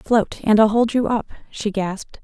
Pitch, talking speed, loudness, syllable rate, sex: 215 Hz, 215 wpm, -19 LUFS, 4.7 syllables/s, female